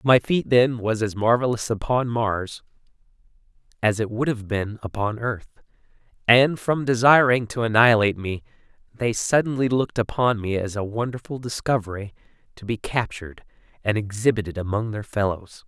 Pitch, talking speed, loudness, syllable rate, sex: 115 Hz, 145 wpm, -22 LUFS, 5.2 syllables/s, male